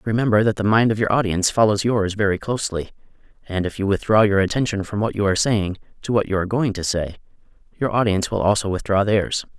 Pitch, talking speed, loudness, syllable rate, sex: 105 Hz, 220 wpm, -20 LUFS, 6.4 syllables/s, male